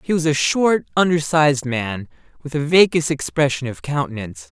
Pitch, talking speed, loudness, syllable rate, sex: 145 Hz, 155 wpm, -18 LUFS, 5.3 syllables/s, male